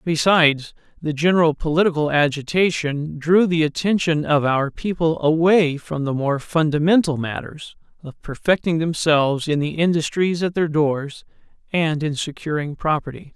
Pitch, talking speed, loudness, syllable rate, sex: 155 Hz, 135 wpm, -19 LUFS, 4.7 syllables/s, male